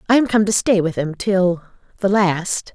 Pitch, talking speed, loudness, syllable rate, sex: 195 Hz, 195 wpm, -18 LUFS, 4.4 syllables/s, female